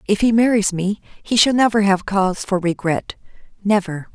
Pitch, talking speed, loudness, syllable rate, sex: 200 Hz, 160 wpm, -18 LUFS, 5.0 syllables/s, female